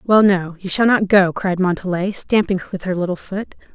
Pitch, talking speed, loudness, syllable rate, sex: 190 Hz, 190 wpm, -18 LUFS, 5.0 syllables/s, female